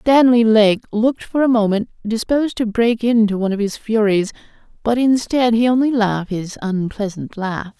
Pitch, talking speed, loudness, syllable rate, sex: 220 Hz, 170 wpm, -17 LUFS, 5.1 syllables/s, female